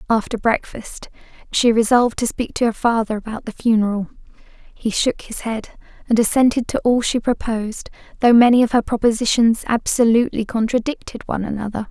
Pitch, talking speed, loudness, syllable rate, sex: 230 Hz, 155 wpm, -18 LUFS, 5.7 syllables/s, female